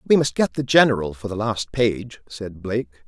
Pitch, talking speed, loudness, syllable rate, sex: 110 Hz, 215 wpm, -21 LUFS, 5.2 syllables/s, male